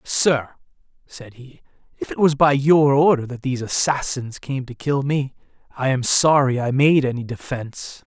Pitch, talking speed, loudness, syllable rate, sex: 135 Hz, 170 wpm, -19 LUFS, 4.7 syllables/s, male